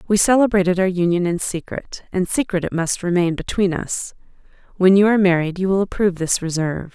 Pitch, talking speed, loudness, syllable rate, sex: 185 Hz, 190 wpm, -19 LUFS, 5.9 syllables/s, female